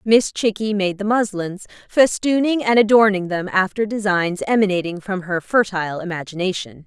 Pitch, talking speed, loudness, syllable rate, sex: 200 Hz, 140 wpm, -19 LUFS, 5.0 syllables/s, female